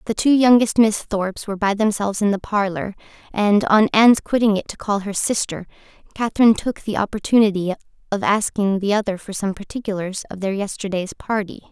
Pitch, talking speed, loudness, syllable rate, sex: 205 Hz, 180 wpm, -19 LUFS, 5.8 syllables/s, female